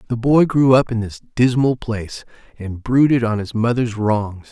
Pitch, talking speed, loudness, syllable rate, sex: 115 Hz, 185 wpm, -17 LUFS, 4.7 syllables/s, male